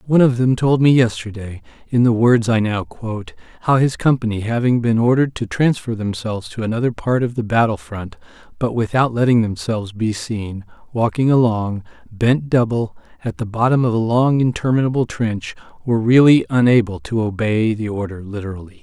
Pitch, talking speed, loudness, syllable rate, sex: 115 Hz, 165 wpm, -18 LUFS, 5.4 syllables/s, male